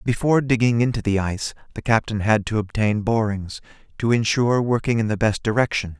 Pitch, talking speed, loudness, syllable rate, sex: 110 Hz, 180 wpm, -21 LUFS, 5.8 syllables/s, male